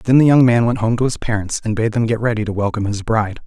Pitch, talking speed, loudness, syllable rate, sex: 115 Hz, 310 wpm, -17 LUFS, 6.9 syllables/s, male